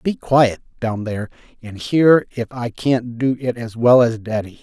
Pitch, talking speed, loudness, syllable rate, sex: 120 Hz, 195 wpm, -18 LUFS, 4.4 syllables/s, male